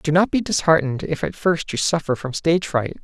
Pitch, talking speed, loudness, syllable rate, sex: 155 Hz, 235 wpm, -20 LUFS, 5.8 syllables/s, male